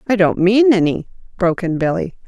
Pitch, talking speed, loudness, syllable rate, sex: 190 Hz, 185 wpm, -16 LUFS, 5.7 syllables/s, female